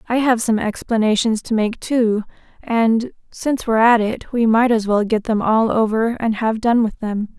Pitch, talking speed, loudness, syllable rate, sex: 225 Hz, 205 wpm, -18 LUFS, 4.7 syllables/s, female